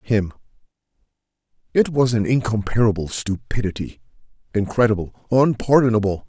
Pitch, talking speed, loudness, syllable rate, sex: 110 Hz, 65 wpm, -20 LUFS, 5.5 syllables/s, male